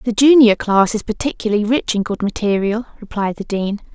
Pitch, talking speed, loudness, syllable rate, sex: 215 Hz, 185 wpm, -17 LUFS, 5.5 syllables/s, female